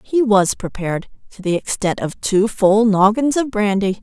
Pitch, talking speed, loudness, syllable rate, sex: 210 Hz, 180 wpm, -17 LUFS, 4.6 syllables/s, female